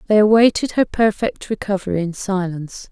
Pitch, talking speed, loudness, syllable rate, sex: 200 Hz, 145 wpm, -18 LUFS, 5.5 syllables/s, female